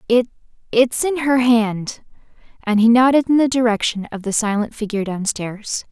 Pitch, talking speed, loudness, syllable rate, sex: 230 Hz, 150 wpm, -18 LUFS, 5.0 syllables/s, female